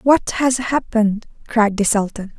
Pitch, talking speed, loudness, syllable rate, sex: 225 Hz, 150 wpm, -18 LUFS, 4.4 syllables/s, female